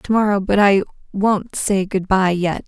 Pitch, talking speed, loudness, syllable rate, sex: 195 Hz, 155 wpm, -17 LUFS, 4.3 syllables/s, female